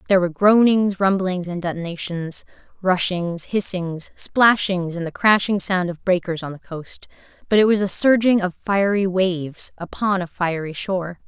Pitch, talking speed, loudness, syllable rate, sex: 185 Hz, 160 wpm, -20 LUFS, 4.7 syllables/s, female